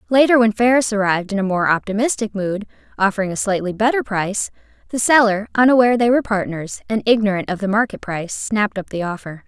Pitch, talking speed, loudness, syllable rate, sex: 210 Hz, 190 wpm, -18 LUFS, 6.5 syllables/s, female